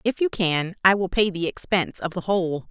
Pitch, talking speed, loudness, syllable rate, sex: 185 Hz, 245 wpm, -23 LUFS, 5.5 syllables/s, female